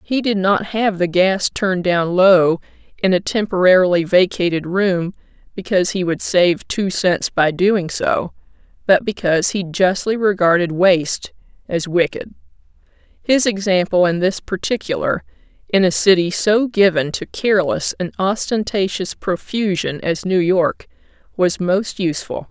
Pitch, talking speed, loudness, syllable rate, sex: 185 Hz, 140 wpm, -17 LUFS, 4.5 syllables/s, female